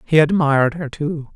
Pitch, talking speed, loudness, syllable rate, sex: 150 Hz, 175 wpm, -18 LUFS, 4.8 syllables/s, female